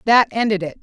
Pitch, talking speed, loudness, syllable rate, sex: 210 Hz, 220 wpm, -17 LUFS, 6.2 syllables/s, female